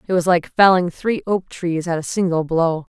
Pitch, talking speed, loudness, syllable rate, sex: 175 Hz, 225 wpm, -19 LUFS, 4.8 syllables/s, female